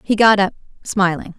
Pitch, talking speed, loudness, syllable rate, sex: 195 Hz, 175 wpm, -16 LUFS, 5.0 syllables/s, female